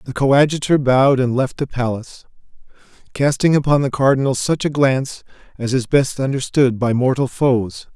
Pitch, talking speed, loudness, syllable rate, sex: 130 Hz, 160 wpm, -17 LUFS, 5.3 syllables/s, male